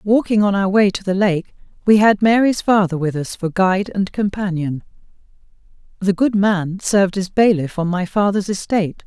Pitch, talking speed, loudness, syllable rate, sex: 195 Hz, 180 wpm, -17 LUFS, 5.1 syllables/s, female